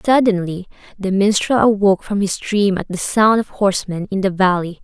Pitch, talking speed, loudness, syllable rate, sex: 195 Hz, 185 wpm, -17 LUFS, 5.3 syllables/s, female